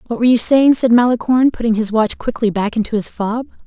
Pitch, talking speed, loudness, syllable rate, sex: 230 Hz, 230 wpm, -15 LUFS, 6.3 syllables/s, female